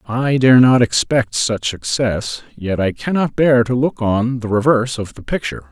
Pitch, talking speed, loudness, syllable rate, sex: 120 Hz, 190 wpm, -16 LUFS, 4.6 syllables/s, male